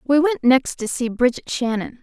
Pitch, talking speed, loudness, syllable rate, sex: 255 Hz, 210 wpm, -20 LUFS, 4.9 syllables/s, female